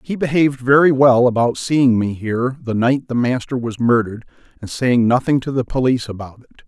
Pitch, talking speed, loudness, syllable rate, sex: 125 Hz, 200 wpm, -16 LUFS, 5.6 syllables/s, male